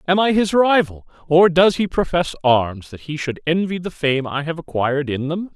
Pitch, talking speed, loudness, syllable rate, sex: 160 Hz, 215 wpm, -18 LUFS, 5.0 syllables/s, male